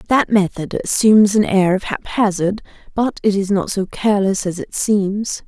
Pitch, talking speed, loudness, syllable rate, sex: 200 Hz, 175 wpm, -17 LUFS, 4.7 syllables/s, female